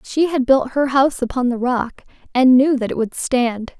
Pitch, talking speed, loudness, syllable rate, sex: 260 Hz, 220 wpm, -17 LUFS, 4.9 syllables/s, female